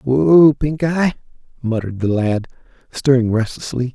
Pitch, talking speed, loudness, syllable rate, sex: 125 Hz, 120 wpm, -17 LUFS, 4.4 syllables/s, male